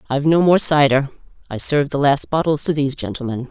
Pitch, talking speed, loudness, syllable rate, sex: 145 Hz, 205 wpm, -17 LUFS, 6.5 syllables/s, female